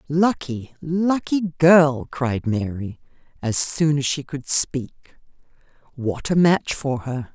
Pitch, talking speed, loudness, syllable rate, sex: 145 Hz, 130 wpm, -21 LUFS, 3.4 syllables/s, female